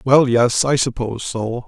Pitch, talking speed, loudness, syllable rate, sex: 125 Hz, 180 wpm, -18 LUFS, 4.5 syllables/s, male